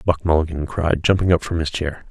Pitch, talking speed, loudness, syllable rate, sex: 80 Hz, 230 wpm, -20 LUFS, 5.7 syllables/s, male